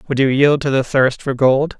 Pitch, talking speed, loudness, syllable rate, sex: 135 Hz, 265 wpm, -15 LUFS, 4.9 syllables/s, male